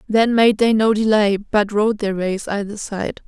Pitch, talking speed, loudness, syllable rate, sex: 210 Hz, 200 wpm, -18 LUFS, 4.2 syllables/s, female